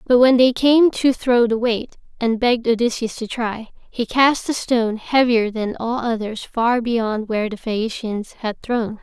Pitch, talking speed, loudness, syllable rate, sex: 235 Hz, 185 wpm, -19 LUFS, 4.3 syllables/s, female